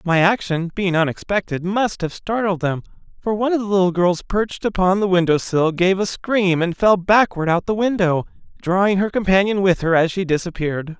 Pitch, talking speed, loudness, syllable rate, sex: 185 Hz, 195 wpm, -19 LUFS, 5.3 syllables/s, male